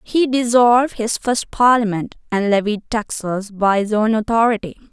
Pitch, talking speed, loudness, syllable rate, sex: 220 Hz, 145 wpm, -17 LUFS, 4.7 syllables/s, female